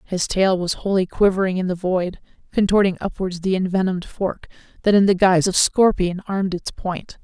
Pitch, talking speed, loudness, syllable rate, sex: 185 Hz, 180 wpm, -20 LUFS, 5.4 syllables/s, female